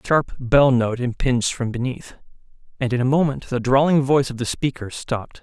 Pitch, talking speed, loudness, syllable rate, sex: 130 Hz, 200 wpm, -20 LUFS, 5.5 syllables/s, male